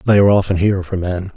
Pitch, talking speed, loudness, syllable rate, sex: 95 Hz, 265 wpm, -16 LUFS, 7.6 syllables/s, male